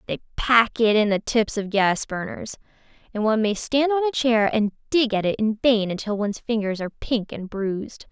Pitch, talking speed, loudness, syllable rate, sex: 220 Hz, 215 wpm, -22 LUFS, 5.4 syllables/s, female